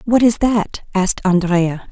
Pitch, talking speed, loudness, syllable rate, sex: 200 Hz, 155 wpm, -16 LUFS, 4.1 syllables/s, female